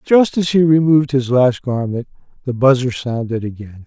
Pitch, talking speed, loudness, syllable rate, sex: 130 Hz, 170 wpm, -16 LUFS, 5.0 syllables/s, male